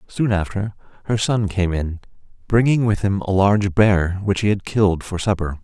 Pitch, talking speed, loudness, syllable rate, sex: 100 Hz, 190 wpm, -19 LUFS, 5.0 syllables/s, male